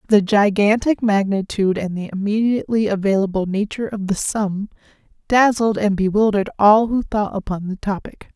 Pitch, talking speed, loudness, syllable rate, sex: 205 Hz, 145 wpm, -18 LUFS, 5.4 syllables/s, female